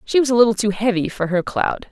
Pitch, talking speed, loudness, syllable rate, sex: 215 Hz, 280 wpm, -18 LUFS, 6.1 syllables/s, female